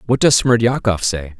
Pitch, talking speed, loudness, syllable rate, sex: 110 Hz, 170 wpm, -15 LUFS, 4.6 syllables/s, male